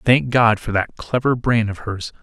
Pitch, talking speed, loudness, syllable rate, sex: 115 Hz, 215 wpm, -19 LUFS, 4.4 syllables/s, male